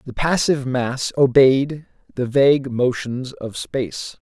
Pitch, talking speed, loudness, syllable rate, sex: 130 Hz, 125 wpm, -19 LUFS, 4.1 syllables/s, male